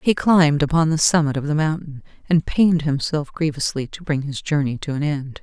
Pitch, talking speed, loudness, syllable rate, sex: 150 Hz, 210 wpm, -20 LUFS, 5.5 syllables/s, female